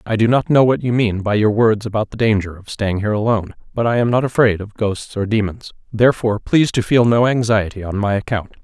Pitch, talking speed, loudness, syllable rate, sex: 110 Hz, 245 wpm, -17 LUFS, 6.1 syllables/s, male